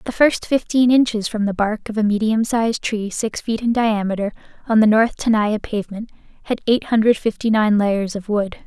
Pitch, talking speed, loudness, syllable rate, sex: 220 Hz, 200 wpm, -19 LUFS, 5.1 syllables/s, female